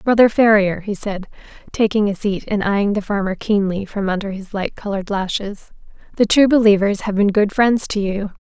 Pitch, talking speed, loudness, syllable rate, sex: 205 Hz, 190 wpm, -18 LUFS, 5.3 syllables/s, female